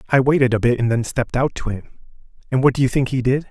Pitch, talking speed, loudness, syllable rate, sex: 125 Hz, 290 wpm, -19 LUFS, 7.2 syllables/s, male